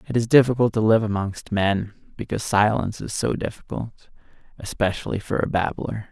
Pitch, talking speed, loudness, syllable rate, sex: 105 Hz, 155 wpm, -22 LUFS, 5.6 syllables/s, male